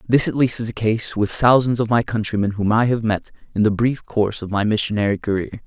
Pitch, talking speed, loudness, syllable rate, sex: 110 Hz, 245 wpm, -20 LUFS, 5.8 syllables/s, male